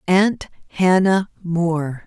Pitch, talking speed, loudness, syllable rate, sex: 175 Hz, 85 wpm, -19 LUFS, 3.3 syllables/s, female